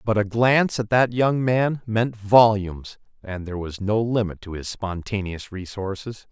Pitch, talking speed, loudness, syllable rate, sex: 105 Hz, 170 wpm, -22 LUFS, 4.5 syllables/s, male